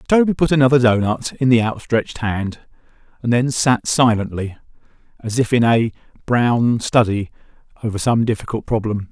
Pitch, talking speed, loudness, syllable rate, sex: 120 Hz, 145 wpm, -18 LUFS, 5.1 syllables/s, male